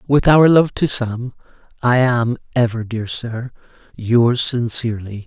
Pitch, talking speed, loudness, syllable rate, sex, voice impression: 120 Hz, 135 wpm, -17 LUFS, 4.0 syllables/s, male, masculine, adult-like, slightly tensed, slightly weak, hard, slightly muffled, intellectual, calm, mature, slightly friendly, wild, slightly kind, slightly modest